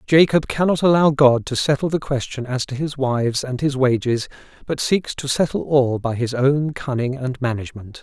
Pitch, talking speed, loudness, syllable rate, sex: 135 Hz, 195 wpm, -20 LUFS, 5.1 syllables/s, male